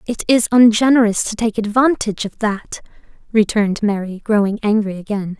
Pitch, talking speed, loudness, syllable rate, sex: 215 Hz, 145 wpm, -16 LUFS, 5.5 syllables/s, female